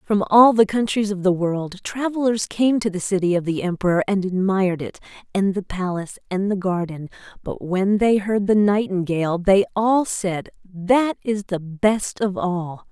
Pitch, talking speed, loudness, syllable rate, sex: 195 Hz, 180 wpm, -20 LUFS, 4.6 syllables/s, female